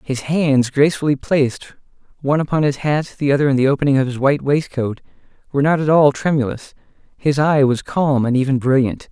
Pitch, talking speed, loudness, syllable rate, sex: 140 Hz, 190 wpm, -17 LUFS, 5.9 syllables/s, male